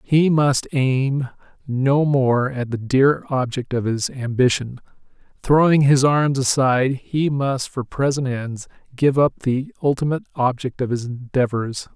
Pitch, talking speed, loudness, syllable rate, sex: 135 Hz, 145 wpm, -20 LUFS, 4.1 syllables/s, male